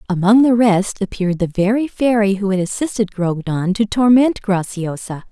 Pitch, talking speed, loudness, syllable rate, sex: 205 Hz, 160 wpm, -16 LUFS, 4.9 syllables/s, female